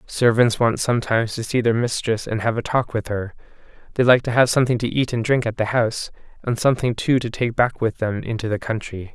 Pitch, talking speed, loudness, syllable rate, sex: 115 Hz, 235 wpm, -20 LUFS, 5.9 syllables/s, male